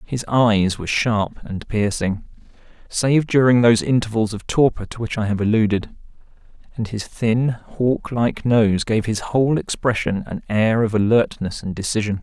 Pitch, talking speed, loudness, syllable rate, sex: 110 Hz, 160 wpm, -19 LUFS, 4.6 syllables/s, male